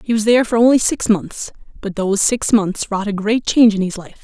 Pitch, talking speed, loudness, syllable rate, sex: 215 Hz, 255 wpm, -16 LUFS, 5.9 syllables/s, female